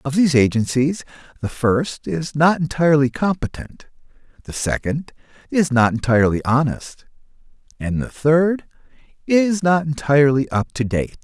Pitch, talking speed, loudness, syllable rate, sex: 145 Hz, 130 wpm, -19 LUFS, 4.8 syllables/s, male